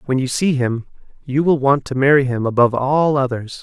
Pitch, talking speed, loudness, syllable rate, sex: 135 Hz, 215 wpm, -17 LUFS, 5.4 syllables/s, male